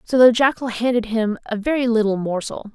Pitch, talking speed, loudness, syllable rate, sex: 230 Hz, 195 wpm, -19 LUFS, 5.5 syllables/s, female